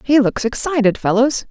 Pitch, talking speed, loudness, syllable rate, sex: 245 Hz, 160 wpm, -16 LUFS, 5.0 syllables/s, female